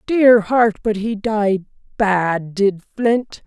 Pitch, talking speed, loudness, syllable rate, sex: 210 Hz, 140 wpm, -17 LUFS, 2.9 syllables/s, female